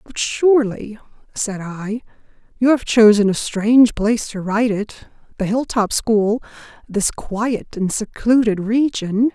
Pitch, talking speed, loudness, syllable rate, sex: 220 Hz, 120 wpm, -18 LUFS, 4.1 syllables/s, female